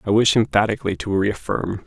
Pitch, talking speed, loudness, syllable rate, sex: 105 Hz, 160 wpm, -20 LUFS, 5.7 syllables/s, male